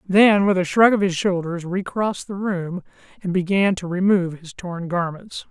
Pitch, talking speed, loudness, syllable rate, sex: 185 Hz, 185 wpm, -20 LUFS, 4.8 syllables/s, male